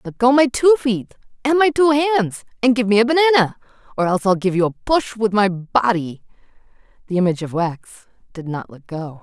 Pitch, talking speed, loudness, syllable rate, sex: 220 Hz, 210 wpm, -18 LUFS, 5.5 syllables/s, female